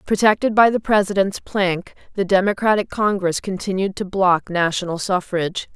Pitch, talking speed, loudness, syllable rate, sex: 195 Hz, 135 wpm, -19 LUFS, 5.0 syllables/s, female